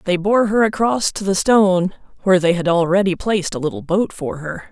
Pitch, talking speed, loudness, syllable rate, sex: 185 Hz, 215 wpm, -17 LUFS, 5.6 syllables/s, female